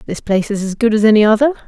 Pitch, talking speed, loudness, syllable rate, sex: 220 Hz, 285 wpm, -14 LUFS, 7.9 syllables/s, female